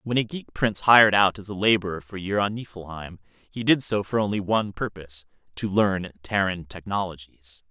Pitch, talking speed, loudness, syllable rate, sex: 100 Hz, 185 wpm, -23 LUFS, 5.4 syllables/s, male